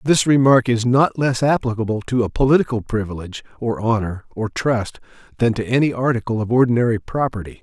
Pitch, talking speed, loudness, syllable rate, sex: 120 Hz, 165 wpm, -19 LUFS, 5.8 syllables/s, male